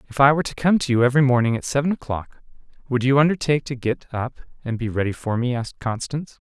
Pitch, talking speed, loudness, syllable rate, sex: 130 Hz, 230 wpm, -21 LUFS, 6.9 syllables/s, male